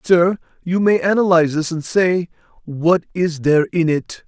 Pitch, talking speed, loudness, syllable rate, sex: 170 Hz, 170 wpm, -17 LUFS, 4.6 syllables/s, male